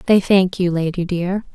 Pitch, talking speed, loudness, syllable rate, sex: 185 Hz, 195 wpm, -18 LUFS, 4.6 syllables/s, female